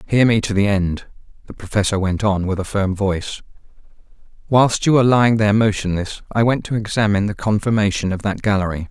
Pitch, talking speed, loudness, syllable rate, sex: 105 Hz, 190 wpm, -18 LUFS, 6.1 syllables/s, male